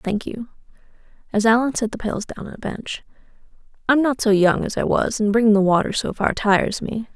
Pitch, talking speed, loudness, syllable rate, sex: 220 Hz, 200 wpm, -20 LUFS, 5.6 syllables/s, female